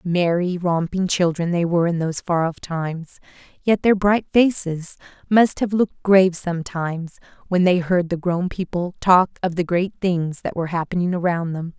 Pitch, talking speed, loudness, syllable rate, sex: 175 Hz, 180 wpm, -20 LUFS, 5.1 syllables/s, female